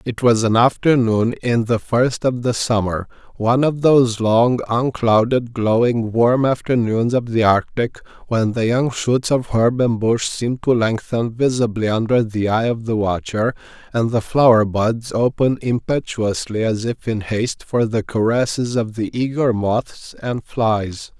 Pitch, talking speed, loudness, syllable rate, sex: 115 Hz, 165 wpm, -18 LUFS, 4.2 syllables/s, male